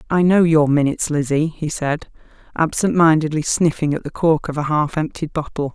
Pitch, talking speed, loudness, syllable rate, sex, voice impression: 155 Hz, 190 wpm, -18 LUFS, 5.3 syllables/s, female, feminine, slightly gender-neutral, adult-like, slightly middle-aged, slightly thin, tensed, slightly powerful, slightly dark, hard, very clear, fluent, very cool, very intellectual, very refreshing, very sincere, calm, friendly, reassuring, unique, very elegant, wild, slightly sweet, slightly strict, slightly modest